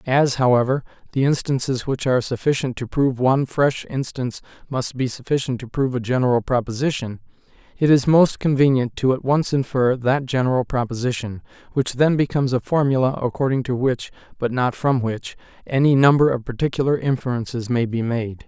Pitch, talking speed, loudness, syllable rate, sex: 130 Hz, 165 wpm, -20 LUFS, 5.6 syllables/s, male